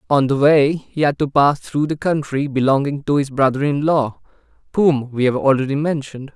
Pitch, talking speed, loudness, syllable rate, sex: 140 Hz, 200 wpm, -18 LUFS, 5.2 syllables/s, male